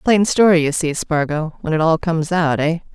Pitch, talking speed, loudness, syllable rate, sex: 165 Hz, 225 wpm, -17 LUFS, 5.3 syllables/s, female